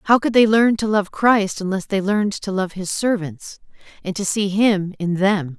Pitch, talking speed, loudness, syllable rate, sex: 200 Hz, 215 wpm, -19 LUFS, 4.5 syllables/s, female